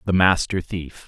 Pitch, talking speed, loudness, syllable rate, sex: 90 Hz, 165 wpm, -21 LUFS, 4.3 syllables/s, male